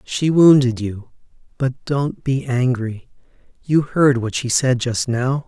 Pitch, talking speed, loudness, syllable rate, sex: 130 Hz, 155 wpm, -18 LUFS, 3.8 syllables/s, male